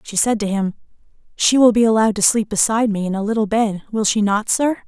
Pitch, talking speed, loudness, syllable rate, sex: 215 Hz, 245 wpm, -17 LUFS, 6.3 syllables/s, female